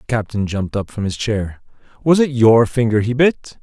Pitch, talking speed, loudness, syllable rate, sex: 115 Hz, 215 wpm, -17 LUFS, 5.3 syllables/s, male